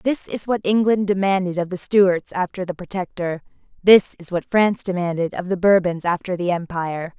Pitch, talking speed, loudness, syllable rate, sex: 185 Hz, 185 wpm, -20 LUFS, 5.3 syllables/s, female